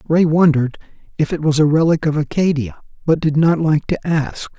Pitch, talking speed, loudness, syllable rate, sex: 155 Hz, 195 wpm, -17 LUFS, 5.5 syllables/s, male